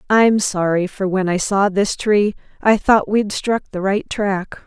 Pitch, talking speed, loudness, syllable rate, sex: 200 Hz, 195 wpm, -18 LUFS, 4.0 syllables/s, female